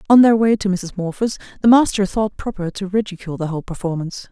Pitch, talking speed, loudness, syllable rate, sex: 195 Hz, 210 wpm, -18 LUFS, 6.5 syllables/s, female